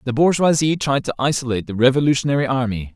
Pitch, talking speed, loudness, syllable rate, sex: 135 Hz, 160 wpm, -18 LUFS, 6.8 syllables/s, male